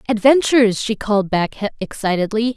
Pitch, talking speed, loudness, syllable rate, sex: 220 Hz, 115 wpm, -17 LUFS, 5.1 syllables/s, female